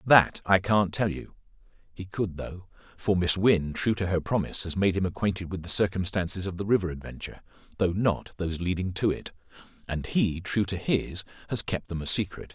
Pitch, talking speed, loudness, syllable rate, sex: 95 Hz, 200 wpm, -28 LUFS, 5.4 syllables/s, male